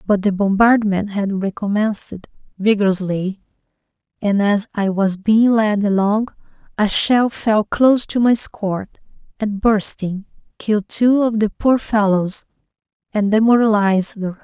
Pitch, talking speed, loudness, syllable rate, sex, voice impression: 210 Hz, 135 wpm, -17 LUFS, 4.5 syllables/s, female, feminine, adult-like, weak, soft, slightly halting, intellectual, calm, friendly, reassuring, elegant, kind, slightly modest